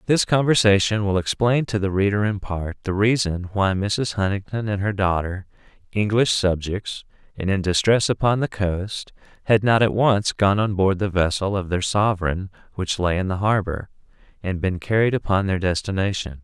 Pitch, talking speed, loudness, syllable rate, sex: 100 Hz, 175 wpm, -21 LUFS, 4.9 syllables/s, male